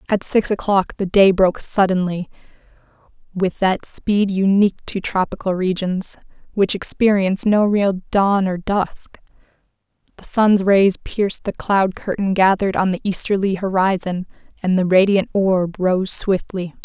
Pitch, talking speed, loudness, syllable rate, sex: 190 Hz, 140 wpm, -18 LUFS, 4.5 syllables/s, female